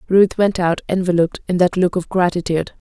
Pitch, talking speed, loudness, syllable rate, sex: 180 Hz, 185 wpm, -18 LUFS, 6.0 syllables/s, female